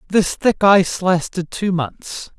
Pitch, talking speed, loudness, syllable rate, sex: 185 Hz, 150 wpm, -17 LUFS, 3.8 syllables/s, male